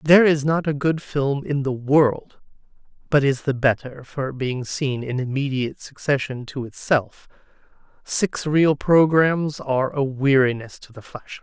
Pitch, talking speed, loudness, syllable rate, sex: 140 Hz, 160 wpm, -21 LUFS, 4.4 syllables/s, male